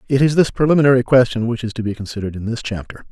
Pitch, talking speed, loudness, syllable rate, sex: 120 Hz, 250 wpm, -17 LUFS, 7.6 syllables/s, male